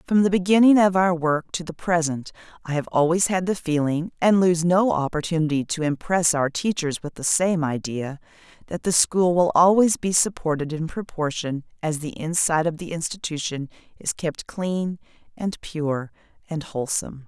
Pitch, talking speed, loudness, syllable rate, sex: 165 Hz, 170 wpm, -22 LUFS, 4.9 syllables/s, female